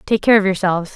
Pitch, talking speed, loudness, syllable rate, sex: 195 Hz, 250 wpm, -15 LUFS, 7.2 syllables/s, female